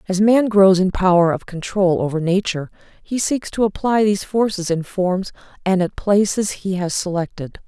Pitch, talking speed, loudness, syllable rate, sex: 190 Hz, 180 wpm, -18 LUFS, 5.0 syllables/s, female